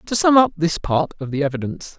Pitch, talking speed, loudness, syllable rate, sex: 170 Hz, 240 wpm, -19 LUFS, 6.1 syllables/s, male